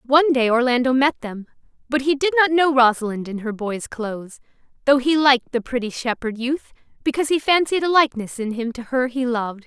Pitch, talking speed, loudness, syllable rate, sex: 255 Hz, 205 wpm, -20 LUFS, 5.8 syllables/s, female